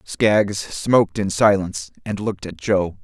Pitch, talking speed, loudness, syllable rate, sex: 100 Hz, 160 wpm, -20 LUFS, 4.3 syllables/s, male